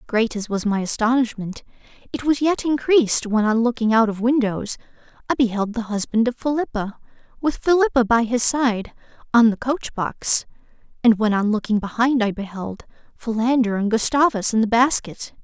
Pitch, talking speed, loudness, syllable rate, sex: 235 Hz, 165 wpm, -20 LUFS, 5.2 syllables/s, female